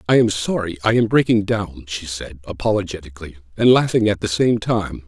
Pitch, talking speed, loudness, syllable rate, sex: 100 Hz, 190 wpm, -19 LUFS, 5.5 syllables/s, male